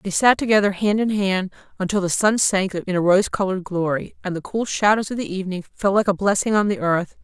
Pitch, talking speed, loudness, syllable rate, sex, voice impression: 195 Hz, 240 wpm, -20 LUFS, 5.9 syllables/s, female, feminine, very adult-like, intellectual, slightly sharp